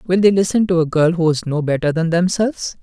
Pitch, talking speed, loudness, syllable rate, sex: 175 Hz, 255 wpm, -17 LUFS, 6.0 syllables/s, male